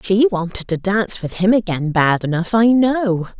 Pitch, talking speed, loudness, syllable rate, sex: 195 Hz, 195 wpm, -17 LUFS, 4.7 syllables/s, female